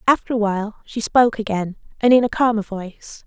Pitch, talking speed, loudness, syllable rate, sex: 220 Hz, 185 wpm, -19 LUFS, 6.1 syllables/s, female